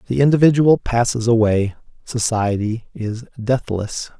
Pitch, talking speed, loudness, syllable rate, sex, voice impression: 115 Hz, 100 wpm, -18 LUFS, 4.3 syllables/s, male, masculine, adult-like, sincere, calm, slightly elegant